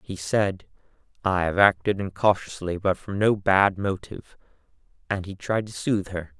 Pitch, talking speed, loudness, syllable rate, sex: 95 Hz, 160 wpm, -24 LUFS, 4.8 syllables/s, male